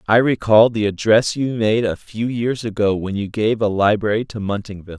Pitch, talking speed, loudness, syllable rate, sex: 110 Hz, 205 wpm, -18 LUFS, 5.2 syllables/s, male